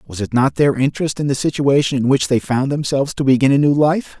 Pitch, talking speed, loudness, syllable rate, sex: 135 Hz, 255 wpm, -16 LUFS, 6.0 syllables/s, male